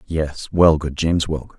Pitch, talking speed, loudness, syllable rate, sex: 80 Hz, 150 wpm, -19 LUFS, 4.9 syllables/s, male